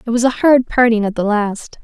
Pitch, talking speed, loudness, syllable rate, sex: 230 Hz, 260 wpm, -15 LUFS, 5.3 syllables/s, female